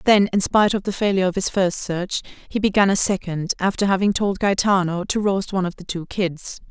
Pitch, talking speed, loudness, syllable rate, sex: 190 Hz, 225 wpm, -20 LUFS, 5.7 syllables/s, female